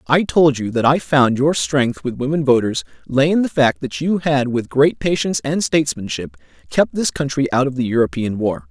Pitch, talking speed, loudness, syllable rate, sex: 145 Hz, 215 wpm, -18 LUFS, 5.1 syllables/s, male